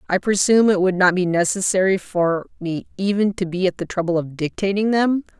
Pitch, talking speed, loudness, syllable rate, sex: 190 Hz, 200 wpm, -19 LUFS, 5.5 syllables/s, female